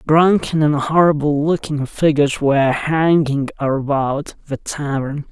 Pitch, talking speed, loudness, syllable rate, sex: 145 Hz, 115 wpm, -17 LUFS, 4.3 syllables/s, male